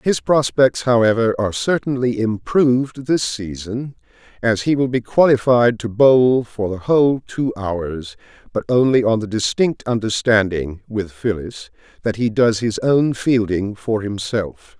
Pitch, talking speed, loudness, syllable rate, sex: 115 Hz, 145 wpm, -18 LUFS, 4.2 syllables/s, male